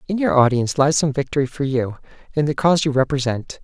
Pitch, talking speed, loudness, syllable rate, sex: 135 Hz, 215 wpm, -19 LUFS, 6.4 syllables/s, male